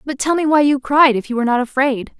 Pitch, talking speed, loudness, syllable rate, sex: 265 Hz, 300 wpm, -16 LUFS, 6.3 syllables/s, female